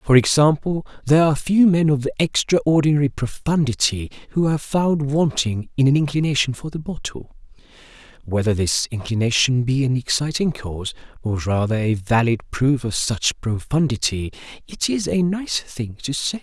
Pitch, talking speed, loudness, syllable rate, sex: 135 Hz, 150 wpm, -20 LUFS, 5.0 syllables/s, male